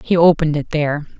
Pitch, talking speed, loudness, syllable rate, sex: 155 Hz, 200 wpm, -16 LUFS, 7.1 syllables/s, female